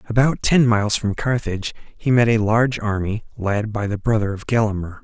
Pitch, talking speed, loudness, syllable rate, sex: 110 Hz, 190 wpm, -20 LUFS, 5.4 syllables/s, male